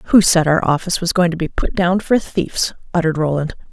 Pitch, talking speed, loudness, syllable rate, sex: 170 Hz, 240 wpm, -17 LUFS, 5.9 syllables/s, female